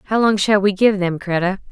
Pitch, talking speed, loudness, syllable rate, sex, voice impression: 195 Hz, 245 wpm, -17 LUFS, 5.6 syllables/s, female, feminine, adult-like, tensed, powerful, clear, slightly fluent, intellectual, elegant, lively, slightly strict, sharp